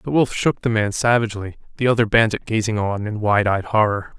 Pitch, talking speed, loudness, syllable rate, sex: 110 Hz, 215 wpm, -19 LUFS, 5.6 syllables/s, male